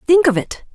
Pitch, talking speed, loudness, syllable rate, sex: 295 Hz, 240 wpm, -16 LUFS, 5.4 syllables/s, female